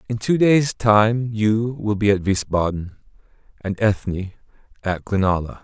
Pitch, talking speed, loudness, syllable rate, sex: 105 Hz, 140 wpm, -20 LUFS, 4.4 syllables/s, male